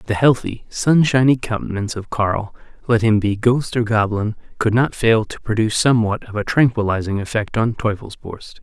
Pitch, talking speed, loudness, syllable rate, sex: 110 Hz, 165 wpm, -18 LUFS, 5.2 syllables/s, male